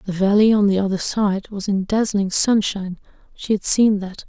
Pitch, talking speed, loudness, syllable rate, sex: 200 Hz, 180 wpm, -19 LUFS, 4.9 syllables/s, female